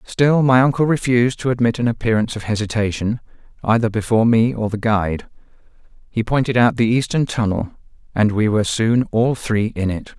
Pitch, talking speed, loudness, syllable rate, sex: 115 Hz, 175 wpm, -18 LUFS, 5.7 syllables/s, male